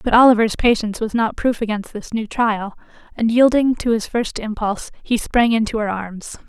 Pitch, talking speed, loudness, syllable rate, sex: 220 Hz, 195 wpm, -18 LUFS, 5.1 syllables/s, female